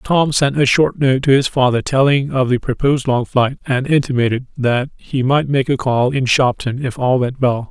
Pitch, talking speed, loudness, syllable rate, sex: 130 Hz, 220 wpm, -16 LUFS, 4.9 syllables/s, male